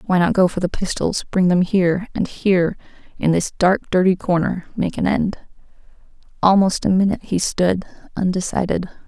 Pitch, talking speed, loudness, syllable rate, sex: 185 Hz, 165 wpm, -19 LUFS, 5.2 syllables/s, female